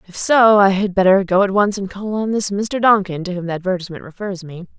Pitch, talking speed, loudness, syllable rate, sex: 195 Hz, 250 wpm, -17 LUFS, 6.0 syllables/s, female